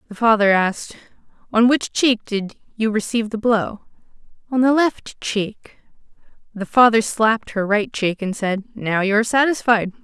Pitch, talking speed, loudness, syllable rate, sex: 220 Hz, 160 wpm, -19 LUFS, 4.8 syllables/s, female